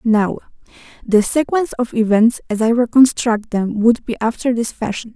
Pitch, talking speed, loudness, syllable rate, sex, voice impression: 230 Hz, 165 wpm, -16 LUFS, 5.1 syllables/s, female, very feminine, slightly young, very thin, slightly tensed, weak, slightly dark, soft, slightly muffled, fluent, slightly raspy, cute, intellectual, very refreshing, sincere, calm, very friendly, reassuring, unique, very elegant, slightly wild, sweet, slightly lively, kind, modest, light